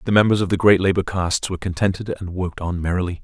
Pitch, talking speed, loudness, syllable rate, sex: 95 Hz, 240 wpm, -20 LUFS, 7.1 syllables/s, male